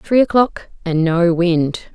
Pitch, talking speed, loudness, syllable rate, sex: 185 Hz, 155 wpm, -16 LUFS, 3.7 syllables/s, female